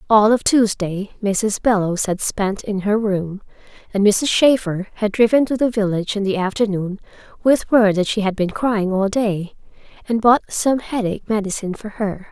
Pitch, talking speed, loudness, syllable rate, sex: 210 Hz, 180 wpm, -18 LUFS, 4.8 syllables/s, female